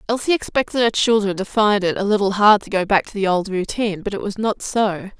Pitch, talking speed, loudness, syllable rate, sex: 205 Hz, 255 wpm, -19 LUFS, 5.9 syllables/s, female